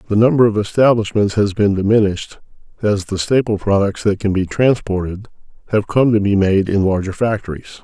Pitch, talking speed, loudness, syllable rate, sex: 105 Hz, 175 wpm, -16 LUFS, 5.6 syllables/s, male